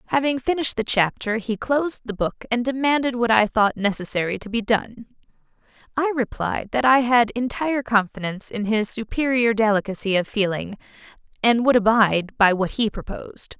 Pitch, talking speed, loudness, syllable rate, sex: 230 Hz, 165 wpm, -21 LUFS, 5.5 syllables/s, female